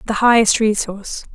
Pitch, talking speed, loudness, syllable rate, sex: 215 Hz, 135 wpm, -15 LUFS, 5.5 syllables/s, female